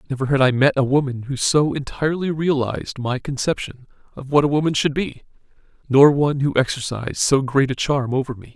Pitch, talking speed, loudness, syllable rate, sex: 135 Hz, 195 wpm, -20 LUFS, 5.8 syllables/s, male